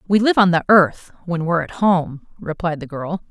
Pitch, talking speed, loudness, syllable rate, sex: 170 Hz, 220 wpm, -18 LUFS, 5.0 syllables/s, female